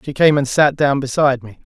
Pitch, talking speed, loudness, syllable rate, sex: 135 Hz, 240 wpm, -16 LUFS, 6.0 syllables/s, male